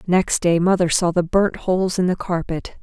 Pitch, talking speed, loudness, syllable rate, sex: 180 Hz, 210 wpm, -19 LUFS, 4.9 syllables/s, female